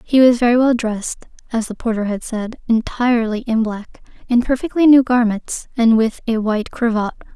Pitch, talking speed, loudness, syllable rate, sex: 230 Hz, 180 wpm, -17 LUFS, 5.2 syllables/s, female